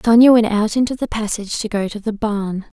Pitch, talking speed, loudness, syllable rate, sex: 215 Hz, 235 wpm, -17 LUFS, 5.8 syllables/s, female